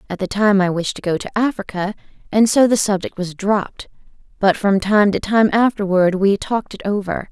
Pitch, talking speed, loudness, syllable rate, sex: 200 Hz, 205 wpm, -17 LUFS, 5.3 syllables/s, female